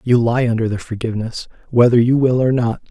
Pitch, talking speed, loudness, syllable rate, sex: 120 Hz, 205 wpm, -16 LUFS, 6.0 syllables/s, male